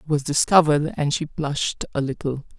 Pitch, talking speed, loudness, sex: 150 Hz, 185 wpm, -22 LUFS, female